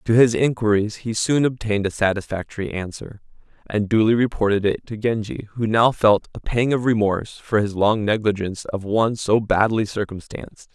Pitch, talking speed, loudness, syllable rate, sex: 110 Hz, 175 wpm, -20 LUFS, 5.3 syllables/s, male